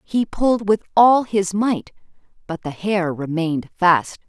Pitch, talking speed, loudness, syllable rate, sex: 195 Hz, 155 wpm, -19 LUFS, 4.1 syllables/s, female